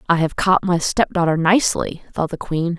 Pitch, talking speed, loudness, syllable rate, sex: 175 Hz, 215 wpm, -19 LUFS, 5.1 syllables/s, female